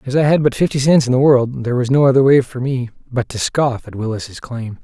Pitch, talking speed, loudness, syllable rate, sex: 130 Hz, 275 wpm, -16 LUFS, 5.8 syllables/s, male